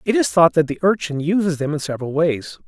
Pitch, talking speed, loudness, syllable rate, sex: 165 Hz, 245 wpm, -19 LUFS, 6.1 syllables/s, male